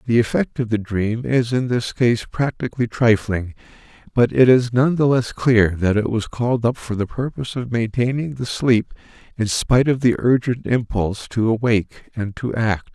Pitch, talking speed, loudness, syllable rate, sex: 115 Hz, 190 wpm, -19 LUFS, 5.0 syllables/s, male